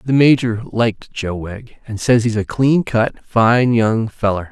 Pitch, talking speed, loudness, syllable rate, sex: 115 Hz, 185 wpm, -16 LUFS, 4.1 syllables/s, male